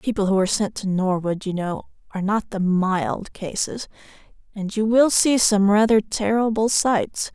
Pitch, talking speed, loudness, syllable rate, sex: 205 Hz, 180 wpm, -21 LUFS, 4.7 syllables/s, female